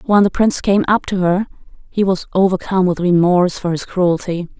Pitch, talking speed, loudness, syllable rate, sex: 185 Hz, 195 wpm, -16 LUFS, 5.7 syllables/s, female